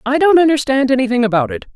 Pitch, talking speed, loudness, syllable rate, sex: 255 Hz, 205 wpm, -14 LUFS, 7.0 syllables/s, female